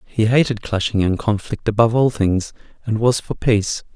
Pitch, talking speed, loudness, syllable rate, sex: 110 Hz, 180 wpm, -18 LUFS, 5.3 syllables/s, male